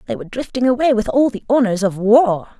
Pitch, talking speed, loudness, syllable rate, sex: 235 Hz, 230 wpm, -16 LUFS, 6.1 syllables/s, female